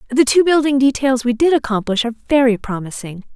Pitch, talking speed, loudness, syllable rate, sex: 255 Hz, 180 wpm, -16 LUFS, 5.9 syllables/s, female